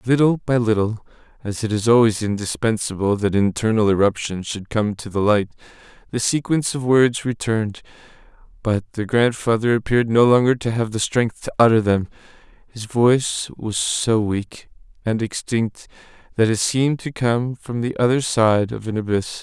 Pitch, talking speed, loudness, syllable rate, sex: 115 Hz, 165 wpm, -20 LUFS, 4.9 syllables/s, male